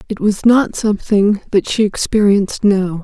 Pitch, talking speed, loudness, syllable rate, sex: 205 Hz, 160 wpm, -14 LUFS, 4.7 syllables/s, female